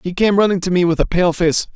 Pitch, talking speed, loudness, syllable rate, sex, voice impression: 180 Hz, 305 wpm, -16 LUFS, 6.3 syllables/s, male, masculine, slightly adult-like, slightly clear, fluent, slightly unique, slightly intense